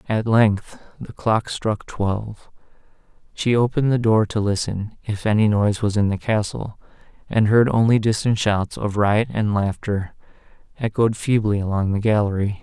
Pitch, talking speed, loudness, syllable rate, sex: 105 Hz, 155 wpm, -20 LUFS, 4.7 syllables/s, male